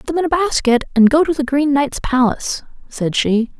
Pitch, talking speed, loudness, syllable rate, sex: 275 Hz, 235 wpm, -16 LUFS, 5.4 syllables/s, female